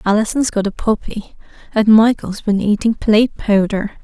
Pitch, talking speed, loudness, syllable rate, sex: 215 Hz, 150 wpm, -15 LUFS, 5.0 syllables/s, female